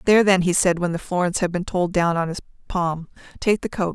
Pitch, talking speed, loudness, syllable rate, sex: 180 Hz, 260 wpm, -21 LUFS, 5.8 syllables/s, female